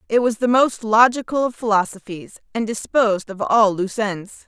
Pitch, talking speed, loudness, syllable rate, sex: 220 Hz, 175 wpm, -19 LUFS, 5.3 syllables/s, female